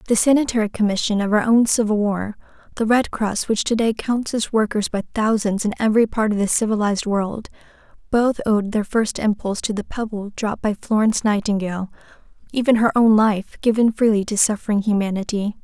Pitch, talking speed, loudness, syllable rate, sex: 215 Hz, 175 wpm, -20 LUFS, 5.7 syllables/s, female